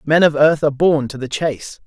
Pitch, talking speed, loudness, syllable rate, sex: 150 Hz, 260 wpm, -16 LUFS, 5.8 syllables/s, male